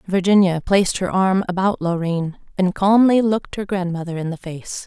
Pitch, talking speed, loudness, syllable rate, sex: 185 Hz, 175 wpm, -19 LUFS, 5.1 syllables/s, female